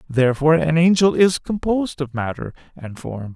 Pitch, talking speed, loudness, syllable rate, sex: 150 Hz, 160 wpm, -18 LUFS, 5.4 syllables/s, male